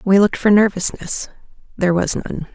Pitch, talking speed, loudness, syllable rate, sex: 195 Hz, 140 wpm, -17 LUFS, 5.6 syllables/s, female